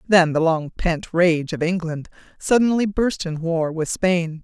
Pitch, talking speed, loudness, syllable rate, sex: 170 Hz, 175 wpm, -20 LUFS, 4.1 syllables/s, female